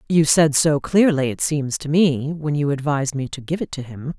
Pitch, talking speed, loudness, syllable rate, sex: 145 Hz, 245 wpm, -19 LUFS, 5.0 syllables/s, female